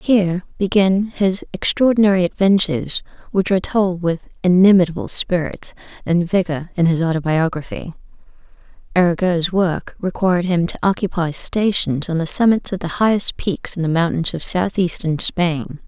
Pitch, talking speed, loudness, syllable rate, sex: 180 Hz, 135 wpm, -18 LUFS, 4.9 syllables/s, female